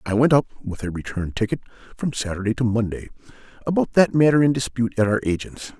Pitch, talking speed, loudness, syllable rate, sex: 115 Hz, 195 wpm, -21 LUFS, 5.4 syllables/s, male